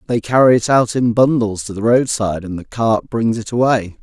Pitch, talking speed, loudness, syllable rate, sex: 115 Hz, 225 wpm, -16 LUFS, 5.3 syllables/s, male